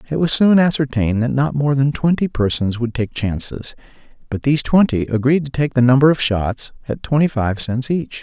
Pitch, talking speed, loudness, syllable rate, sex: 130 Hz, 205 wpm, -17 LUFS, 5.3 syllables/s, male